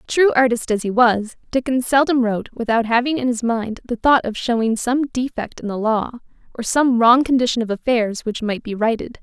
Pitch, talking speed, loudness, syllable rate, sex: 235 Hz, 210 wpm, -19 LUFS, 5.2 syllables/s, female